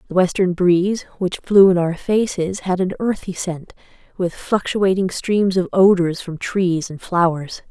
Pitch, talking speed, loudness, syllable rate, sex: 185 Hz, 165 wpm, -18 LUFS, 4.2 syllables/s, female